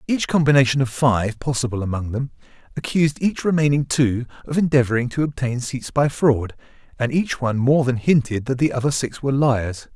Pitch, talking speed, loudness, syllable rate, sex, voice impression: 130 Hz, 180 wpm, -20 LUFS, 5.5 syllables/s, male, very masculine, middle-aged, very thick, tensed, powerful, bright, slightly soft, slightly muffled, fluent, very cool, intellectual, slightly refreshing, sincere, calm, mature, friendly, reassuring, slightly wild, slightly kind, slightly modest